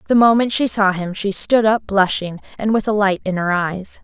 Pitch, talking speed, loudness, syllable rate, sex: 205 Hz, 240 wpm, -17 LUFS, 4.9 syllables/s, female